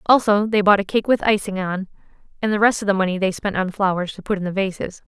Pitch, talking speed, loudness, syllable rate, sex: 200 Hz, 270 wpm, -20 LUFS, 6.4 syllables/s, female